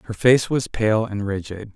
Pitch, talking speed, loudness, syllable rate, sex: 110 Hz, 205 wpm, -20 LUFS, 4.5 syllables/s, male